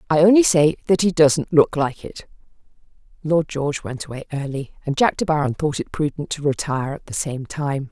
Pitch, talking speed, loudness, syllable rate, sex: 150 Hz, 205 wpm, -20 LUFS, 5.4 syllables/s, female